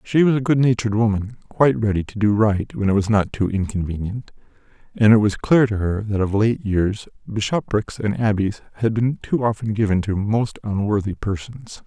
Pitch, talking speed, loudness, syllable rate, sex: 105 Hz, 190 wpm, -20 LUFS, 5.2 syllables/s, male